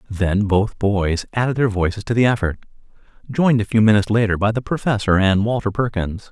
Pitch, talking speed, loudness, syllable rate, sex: 105 Hz, 190 wpm, -18 LUFS, 5.7 syllables/s, male